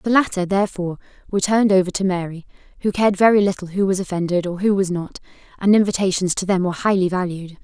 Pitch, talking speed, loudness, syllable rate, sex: 190 Hz, 205 wpm, -19 LUFS, 6.9 syllables/s, female